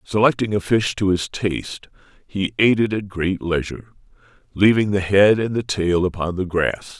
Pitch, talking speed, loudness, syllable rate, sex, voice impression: 100 Hz, 180 wpm, -19 LUFS, 4.9 syllables/s, male, masculine, middle-aged, thick, tensed, powerful, hard, clear, fluent, cool, intellectual, calm, slightly friendly, reassuring, wild, lively, slightly strict